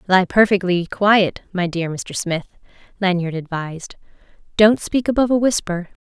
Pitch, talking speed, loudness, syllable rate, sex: 190 Hz, 140 wpm, -18 LUFS, 4.9 syllables/s, female